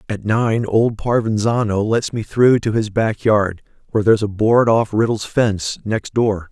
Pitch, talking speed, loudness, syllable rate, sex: 110 Hz, 185 wpm, -17 LUFS, 4.5 syllables/s, male